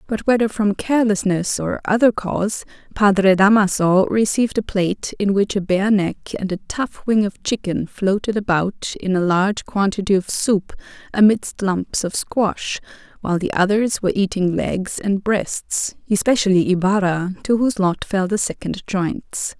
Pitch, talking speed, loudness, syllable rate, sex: 200 Hz, 160 wpm, -19 LUFS, 4.8 syllables/s, female